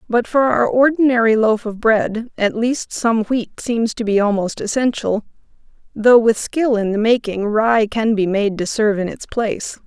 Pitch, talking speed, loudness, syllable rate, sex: 225 Hz, 190 wpm, -17 LUFS, 4.5 syllables/s, female